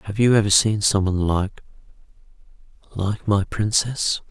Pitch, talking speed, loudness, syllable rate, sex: 100 Hz, 110 wpm, -20 LUFS, 4.5 syllables/s, male